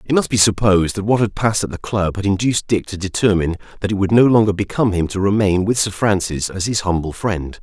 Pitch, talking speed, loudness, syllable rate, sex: 100 Hz, 250 wpm, -17 LUFS, 6.3 syllables/s, male